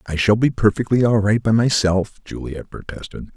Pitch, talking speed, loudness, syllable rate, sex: 105 Hz, 180 wpm, -18 LUFS, 5.2 syllables/s, male